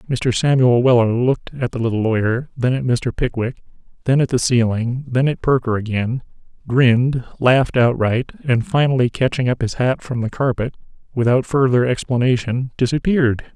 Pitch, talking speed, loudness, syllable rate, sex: 125 Hz, 160 wpm, -18 LUFS, 5.3 syllables/s, male